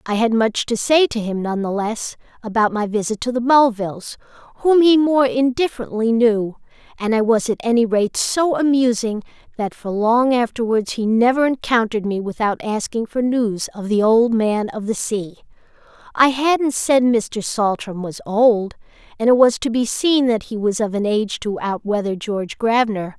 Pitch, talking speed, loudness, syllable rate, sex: 225 Hz, 185 wpm, -18 LUFS, 4.8 syllables/s, female